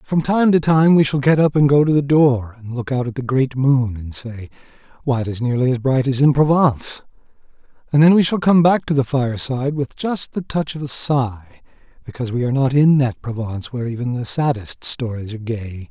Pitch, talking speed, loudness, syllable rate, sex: 130 Hz, 230 wpm, -18 LUFS, 5.6 syllables/s, male